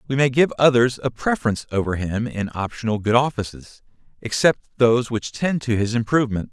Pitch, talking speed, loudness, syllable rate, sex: 115 Hz, 175 wpm, -21 LUFS, 5.9 syllables/s, male